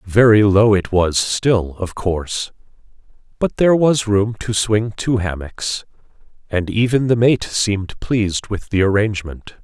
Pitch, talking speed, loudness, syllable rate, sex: 105 Hz, 150 wpm, -17 LUFS, 4.3 syllables/s, male